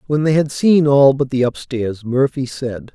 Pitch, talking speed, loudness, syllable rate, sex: 135 Hz, 225 wpm, -16 LUFS, 4.3 syllables/s, male